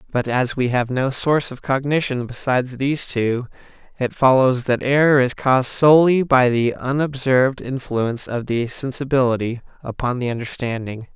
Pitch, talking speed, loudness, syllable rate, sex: 125 Hz, 150 wpm, -19 LUFS, 5.1 syllables/s, male